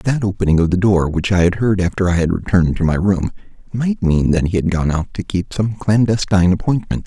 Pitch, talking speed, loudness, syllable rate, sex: 95 Hz, 240 wpm, -17 LUFS, 5.7 syllables/s, male